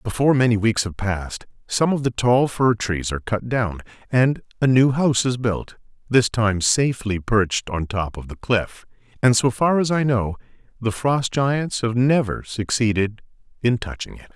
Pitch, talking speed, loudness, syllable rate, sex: 115 Hz, 185 wpm, -21 LUFS, 4.8 syllables/s, male